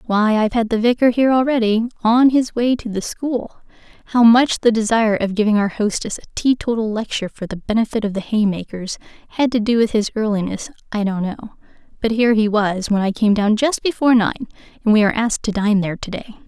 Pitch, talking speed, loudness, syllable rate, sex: 220 Hz, 215 wpm, -18 LUFS, 6.1 syllables/s, female